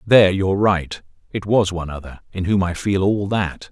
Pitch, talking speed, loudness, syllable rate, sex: 95 Hz, 210 wpm, -19 LUFS, 5.3 syllables/s, male